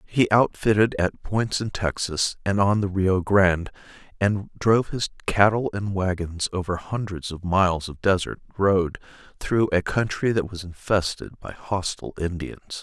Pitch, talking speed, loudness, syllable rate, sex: 95 Hz, 155 wpm, -23 LUFS, 4.5 syllables/s, male